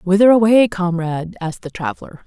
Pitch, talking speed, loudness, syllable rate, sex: 185 Hz, 160 wpm, -16 LUFS, 5.9 syllables/s, female